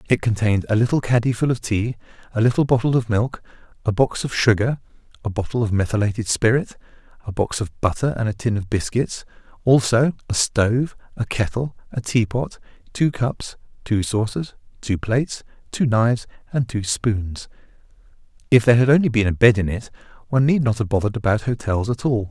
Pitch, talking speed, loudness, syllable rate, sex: 115 Hz, 180 wpm, -21 LUFS, 5.7 syllables/s, male